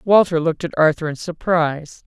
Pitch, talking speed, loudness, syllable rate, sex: 165 Hz, 165 wpm, -19 LUFS, 5.6 syllables/s, female